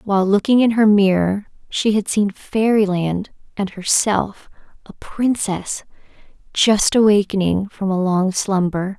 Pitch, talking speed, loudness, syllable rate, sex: 200 Hz, 125 wpm, -18 LUFS, 4.0 syllables/s, female